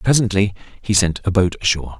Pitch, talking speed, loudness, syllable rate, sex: 100 Hz, 180 wpm, -18 LUFS, 6.3 syllables/s, male